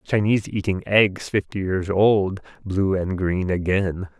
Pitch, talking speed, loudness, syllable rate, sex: 95 Hz, 145 wpm, -22 LUFS, 4.0 syllables/s, male